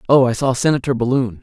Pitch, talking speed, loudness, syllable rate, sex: 125 Hz, 210 wpm, -17 LUFS, 6.4 syllables/s, male